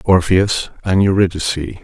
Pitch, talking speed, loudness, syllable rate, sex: 90 Hz, 100 wpm, -16 LUFS, 5.1 syllables/s, male